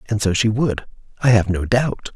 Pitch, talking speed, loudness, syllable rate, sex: 110 Hz, 220 wpm, -19 LUFS, 4.9 syllables/s, male